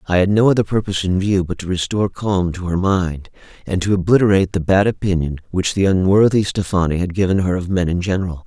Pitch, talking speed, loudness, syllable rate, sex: 95 Hz, 220 wpm, -17 LUFS, 6.3 syllables/s, male